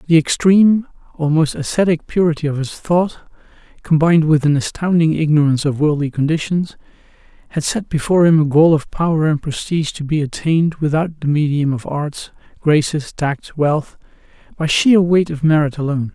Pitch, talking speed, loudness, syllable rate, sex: 155 Hz, 155 wpm, -16 LUFS, 5.4 syllables/s, male